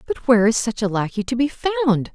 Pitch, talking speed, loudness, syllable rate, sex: 230 Hz, 250 wpm, -20 LUFS, 6.8 syllables/s, female